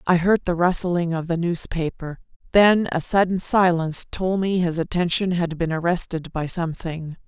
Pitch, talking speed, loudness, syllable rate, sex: 175 Hz, 165 wpm, -21 LUFS, 4.8 syllables/s, female